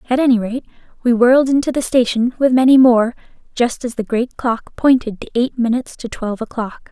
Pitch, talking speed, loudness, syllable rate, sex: 245 Hz, 200 wpm, -16 LUFS, 5.8 syllables/s, female